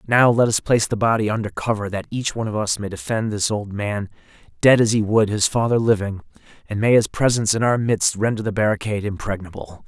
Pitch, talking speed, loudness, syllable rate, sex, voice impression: 105 Hz, 220 wpm, -20 LUFS, 6.1 syllables/s, male, masculine, adult-like, tensed, powerful, clear, cool, friendly, wild, lively, slightly strict